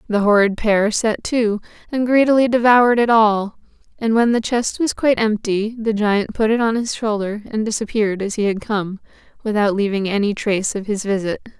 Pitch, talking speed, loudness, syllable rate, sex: 215 Hz, 190 wpm, -18 LUFS, 5.3 syllables/s, female